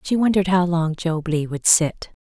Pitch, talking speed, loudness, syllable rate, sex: 170 Hz, 215 wpm, -19 LUFS, 4.9 syllables/s, female